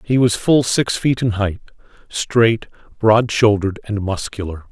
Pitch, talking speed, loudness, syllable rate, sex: 110 Hz, 155 wpm, -17 LUFS, 4.3 syllables/s, male